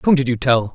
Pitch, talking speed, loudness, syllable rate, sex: 130 Hz, 325 wpm, -17 LUFS, 6.4 syllables/s, male